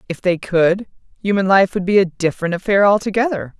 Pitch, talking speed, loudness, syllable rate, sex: 190 Hz, 185 wpm, -17 LUFS, 5.8 syllables/s, female